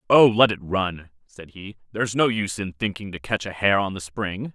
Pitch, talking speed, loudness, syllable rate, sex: 100 Hz, 240 wpm, -22 LUFS, 5.2 syllables/s, male